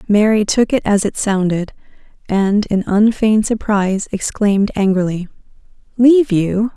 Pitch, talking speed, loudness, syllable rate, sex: 205 Hz, 125 wpm, -15 LUFS, 4.8 syllables/s, female